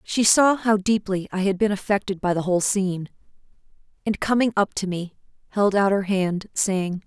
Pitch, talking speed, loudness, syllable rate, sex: 195 Hz, 185 wpm, -22 LUFS, 5.0 syllables/s, female